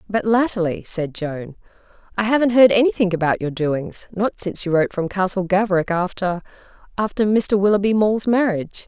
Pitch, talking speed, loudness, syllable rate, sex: 195 Hz, 150 wpm, -19 LUFS, 5.6 syllables/s, female